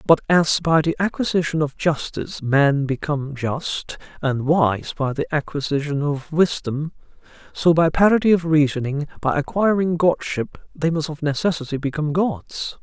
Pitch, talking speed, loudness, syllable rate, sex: 155 Hz, 145 wpm, -20 LUFS, 4.7 syllables/s, male